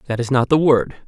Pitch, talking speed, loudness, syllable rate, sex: 135 Hz, 280 wpm, -17 LUFS, 5.6 syllables/s, male